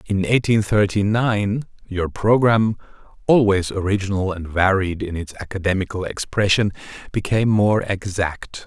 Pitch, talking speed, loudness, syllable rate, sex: 100 Hz, 120 wpm, -20 LUFS, 4.7 syllables/s, male